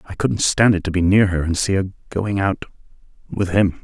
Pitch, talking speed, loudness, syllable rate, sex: 95 Hz, 220 wpm, -19 LUFS, 5.0 syllables/s, male